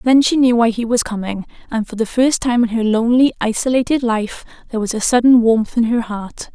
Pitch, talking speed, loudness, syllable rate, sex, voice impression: 235 Hz, 230 wpm, -16 LUFS, 5.6 syllables/s, female, very feminine, young, thin, slightly tensed, slightly powerful, slightly bright, hard, clear, fluent, slightly raspy, cute, slightly intellectual, refreshing, sincere, calm, very friendly, very reassuring, unique, elegant, slightly wild, sweet, lively, slightly kind